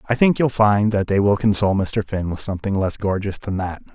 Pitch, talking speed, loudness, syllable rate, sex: 100 Hz, 245 wpm, -20 LUFS, 5.6 syllables/s, male